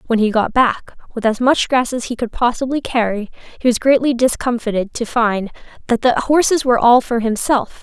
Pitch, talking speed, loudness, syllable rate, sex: 240 Hz, 200 wpm, -16 LUFS, 5.3 syllables/s, female